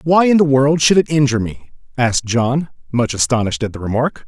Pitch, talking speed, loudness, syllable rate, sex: 130 Hz, 210 wpm, -16 LUFS, 6.0 syllables/s, male